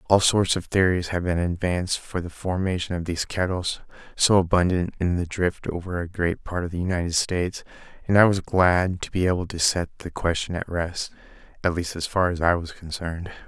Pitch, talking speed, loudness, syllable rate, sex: 90 Hz, 210 wpm, -24 LUFS, 5.4 syllables/s, male